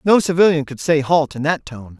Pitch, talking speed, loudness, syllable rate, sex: 150 Hz, 240 wpm, -17 LUFS, 5.3 syllables/s, male